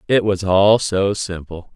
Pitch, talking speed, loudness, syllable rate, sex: 100 Hz, 170 wpm, -17 LUFS, 3.8 syllables/s, male